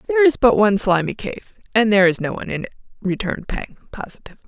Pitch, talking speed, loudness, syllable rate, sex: 220 Hz, 215 wpm, -19 LUFS, 7.4 syllables/s, female